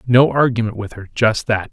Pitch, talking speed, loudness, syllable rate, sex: 115 Hz, 175 wpm, -17 LUFS, 5.3 syllables/s, male